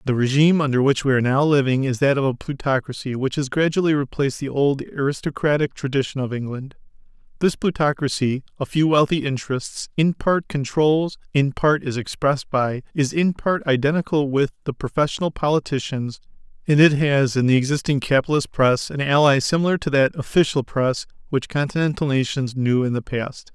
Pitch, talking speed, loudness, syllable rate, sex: 140 Hz, 165 wpm, -21 LUFS, 5.5 syllables/s, male